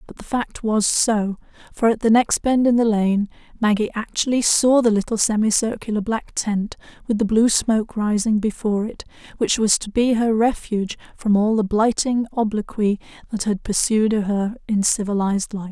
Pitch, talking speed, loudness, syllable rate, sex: 215 Hz, 175 wpm, -20 LUFS, 5.0 syllables/s, female